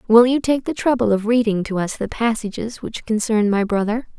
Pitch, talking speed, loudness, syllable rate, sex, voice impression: 225 Hz, 215 wpm, -19 LUFS, 5.3 syllables/s, female, feminine, adult-like, tensed, powerful, bright, slightly muffled, fluent, intellectual, friendly, lively, slightly sharp